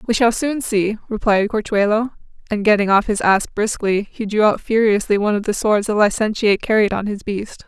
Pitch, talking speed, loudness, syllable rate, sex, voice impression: 210 Hz, 205 wpm, -18 LUFS, 5.5 syllables/s, female, feminine, adult-like, tensed, slightly powerful, slightly bright, clear, fluent, intellectual, calm, reassuring, slightly kind, modest